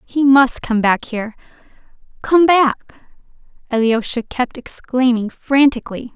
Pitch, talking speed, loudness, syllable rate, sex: 250 Hz, 105 wpm, -16 LUFS, 4.2 syllables/s, female